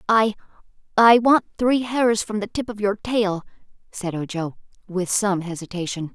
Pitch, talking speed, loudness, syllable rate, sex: 205 Hz, 145 wpm, -21 LUFS, 4.4 syllables/s, female